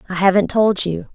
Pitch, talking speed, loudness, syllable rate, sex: 190 Hz, 210 wpm, -17 LUFS, 5.3 syllables/s, female